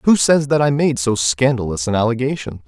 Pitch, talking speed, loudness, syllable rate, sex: 125 Hz, 200 wpm, -17 LUFS, 5.5 syllables/s, male